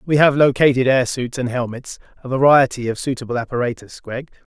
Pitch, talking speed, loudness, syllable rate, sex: 130 Hz, 160 wpm, -18 LUFS, 5.7 syllables/s, male